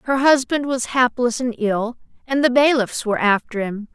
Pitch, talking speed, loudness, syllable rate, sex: 245 Hz, 185 wpm, -19 LUFS, 4.8 syllables/s, female